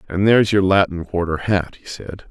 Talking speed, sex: 210 wpm, male